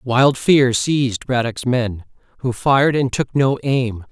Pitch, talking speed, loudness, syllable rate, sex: 125 Hz, 175 wpm, -18 LUFS, 3.8 syllables/s, male